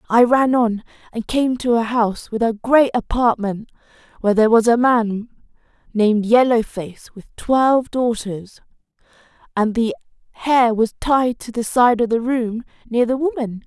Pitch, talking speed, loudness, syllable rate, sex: 235 Hz, 160 wpm, -18 LUFS, 4.6 syllables/s, female